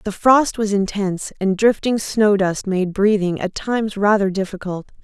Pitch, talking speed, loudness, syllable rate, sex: 200 Hz, 165 wpm, -18 LUFS, 4.7 syllables/s, female